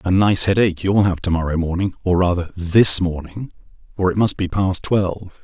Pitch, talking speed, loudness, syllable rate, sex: 90 Hz, 190 wpm, -18 LUFS, 5.3 syllables/s, male